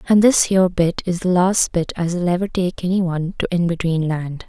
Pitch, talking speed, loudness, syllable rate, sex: 175 Hz, 215 wpm, -19 LUFS, 5.1 syllables/s, female